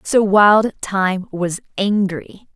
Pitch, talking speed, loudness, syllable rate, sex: 195 Hz, 120 wpm, -17 LUFS, 3.2 syllables/s, female